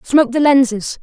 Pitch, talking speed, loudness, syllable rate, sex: 260 Hz, 175 wpm, -14 LUFS, 5.4 syllables/s, female